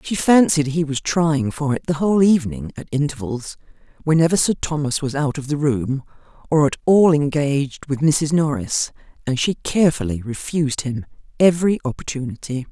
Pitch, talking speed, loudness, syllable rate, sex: 145 Hz, 160 wpm, -19 LUFS, 5.3 syllables/s, female